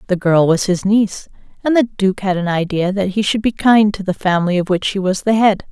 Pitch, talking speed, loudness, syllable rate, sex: 195 Hz, 265 wpm, -16 LUFS, 5.6 syllables/s, female